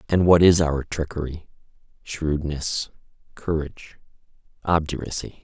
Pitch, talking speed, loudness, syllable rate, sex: 80 Hz, 90 wpm, -22 LUFS, 4.4 syllables/s, male